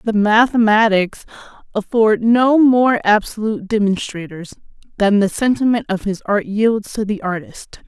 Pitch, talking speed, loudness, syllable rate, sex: 215 Hz, 130 wpm, -16 LUFS, 4.5 syllables/s, female